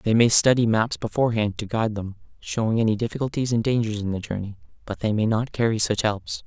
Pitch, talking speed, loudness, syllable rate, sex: 110 Hz, 215 wpm, -23 LUFS, 6.1 syllables/s, male